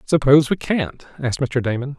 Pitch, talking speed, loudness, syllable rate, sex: 140 Hz, 180 wpm, -19 LUFS, 5.8 syllables/s, male